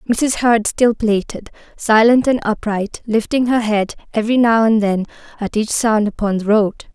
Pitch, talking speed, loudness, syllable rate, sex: 220 Hz, 175 wpm, -16 LUFS, 4.6 syllables/s, female